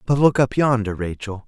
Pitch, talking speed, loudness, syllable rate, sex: 120 Hz, 205 wpm, -19 LUFS, 5.3 syllables/s, male